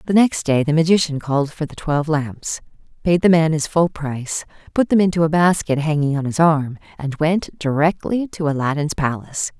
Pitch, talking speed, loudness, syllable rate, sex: 155 Hz, 195 wpm, -19 LUFS, 5.3 syllables/s, female